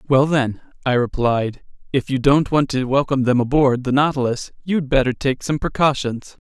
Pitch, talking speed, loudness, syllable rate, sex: 135 Hz, 175 wpm, -19 LUFS, 5.0 syllables/s, male